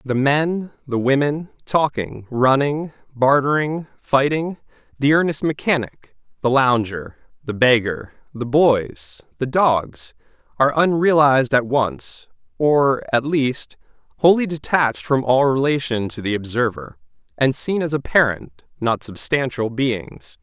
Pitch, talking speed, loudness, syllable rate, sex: 130 Hz, 115 wpm, -19 LUFS, 4.0 syllables/s, male